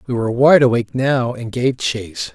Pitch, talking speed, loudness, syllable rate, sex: 125 Hz, 205 wpm, -17 LUFS, 5.5 syllables/s, male